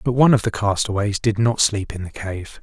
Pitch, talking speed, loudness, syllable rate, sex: 105 Hz, 250 wpm, -20 LUFS, 5.5 syllables/s, male